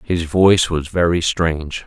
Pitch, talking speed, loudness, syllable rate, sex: 85 Hz, 160 wpm, -17 LUFS, 4.5 syllables/s, male